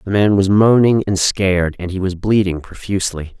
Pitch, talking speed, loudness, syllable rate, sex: 95 Hz, 195 wpm, -16 LUFS, 5.2 syllables/s, male